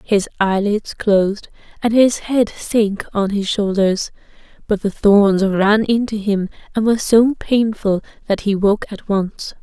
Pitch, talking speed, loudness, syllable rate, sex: 210 Hz, 155 wpm, -17 LUFS, 4.2 syllables/s, female